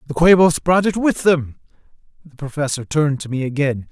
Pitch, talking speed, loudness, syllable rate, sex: 150 Hz, 185 wpm, -17 LUFS, 5.5 syllables/s, male